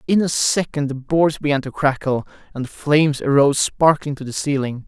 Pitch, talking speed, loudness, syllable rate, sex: 145 Hz, 195 wpm, -19 LUFS, 5.4 syllables/s, male